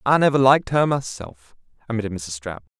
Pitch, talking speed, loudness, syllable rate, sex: 120 Hz, 170 wpm, -20 LUFS, 6.0 syllables/s, male